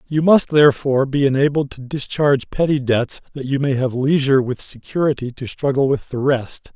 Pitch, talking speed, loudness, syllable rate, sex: 135 Hz, 185 wpm, -18 LUFS, 5.4 syllables/s, male